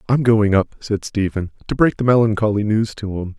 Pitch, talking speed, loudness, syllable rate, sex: 105 Hz, 215 wpm, -18 LUFS, 5.3 syllables/s, male